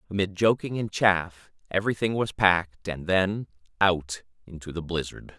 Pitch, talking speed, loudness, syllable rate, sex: 90 Hz, 145 wpm, -26 LUFS, 4.7 syllables/s, male